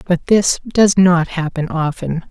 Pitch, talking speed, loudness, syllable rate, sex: 175 Hz, 155 wpm, -15 LUFS, 3.7 syllables/s, female